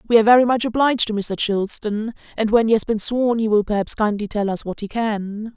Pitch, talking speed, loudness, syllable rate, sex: 220 Hz, 235 wpm, -19 LUFS, 6.0 syllables/s, female